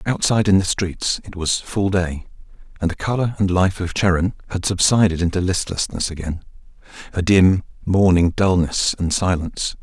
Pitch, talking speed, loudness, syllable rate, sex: 90 Hz, 160 wpm, -19 LUFS, 5.0 syllables/s, male